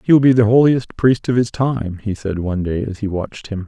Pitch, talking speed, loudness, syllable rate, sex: 110 Hz, 280 wpm, -17 LUFS, 5.7 syllables/s, male